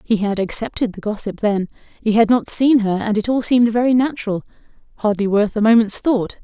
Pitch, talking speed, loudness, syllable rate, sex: 220 Hz, 195 wpm, -17 LUFS, 5.8 syllables/s, female